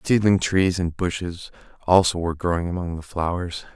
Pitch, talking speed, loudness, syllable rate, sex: 90 Hz, 160 wpm, -22 LUFS, 5.2 syllables/s, male